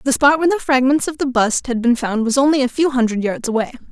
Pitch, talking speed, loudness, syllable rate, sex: 260 Hz, 275 wpm, -17 LUFS, 6.3 syllables/s, female